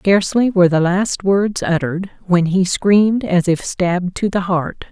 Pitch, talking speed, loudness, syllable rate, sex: 185 Hz, 185 wpm, -16 LUFS, 4.7 syllables/s, female